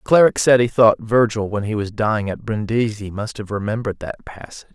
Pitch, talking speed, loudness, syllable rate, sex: 110 Hz, 200 wpm, -19 LUFS, 5.8 syllables/s, male